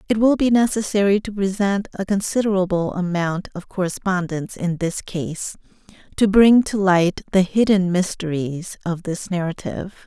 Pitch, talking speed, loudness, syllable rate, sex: 190 Hz, 145 wpm, -20 LUFS, 4.9 syllables/s, female